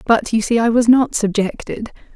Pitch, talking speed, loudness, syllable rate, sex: 225 Hz, 195 wpm, -16 LUFS, 4.9 syllables/s, female